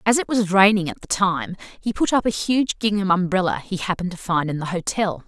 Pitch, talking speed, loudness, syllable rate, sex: 190 Hz, 240 wpm, -21 LUFS, 5.7 syllables/s, female